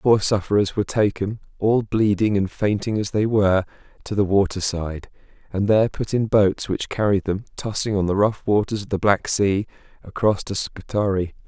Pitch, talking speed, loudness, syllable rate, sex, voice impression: 100 Hz, 190 wpm, -21 LUFS, 5.2 syllables/s, male, very masculine, middle-aged, very thick, slightly relaxed, slightly weak, dark, soft, slightly muffled, slightly fluent, slightly raspy, cool, intellectual, slightly refreshing, very sincere, very calm, very mature, friendly, very reassuring, very unique, elegant, slightly wild, sweet, slightly lively, very kind, modest